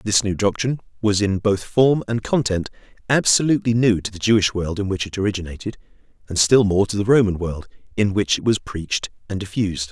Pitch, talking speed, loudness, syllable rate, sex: 105 Hz, 200 wpm, -20 LUFS, 6.0 syllables/s, male